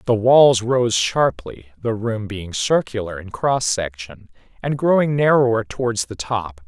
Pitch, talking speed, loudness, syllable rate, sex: 115 Hz, 155 wpm, -19 LUFS, 4.2 syllables/s, male